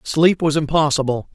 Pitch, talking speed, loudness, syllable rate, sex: 150 Hz, 135 wpm, -18 LUFS, 4.9 syllables/s, male